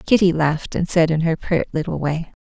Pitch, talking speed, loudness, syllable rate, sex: 165 Hz, 225 wpm, -19 LUFS, 5.7 syllables/s, female